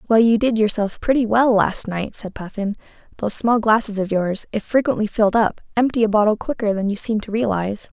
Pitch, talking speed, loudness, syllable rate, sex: 215 Hz, 210 wpm, -19 LUFS, 5.8 syllables/s, female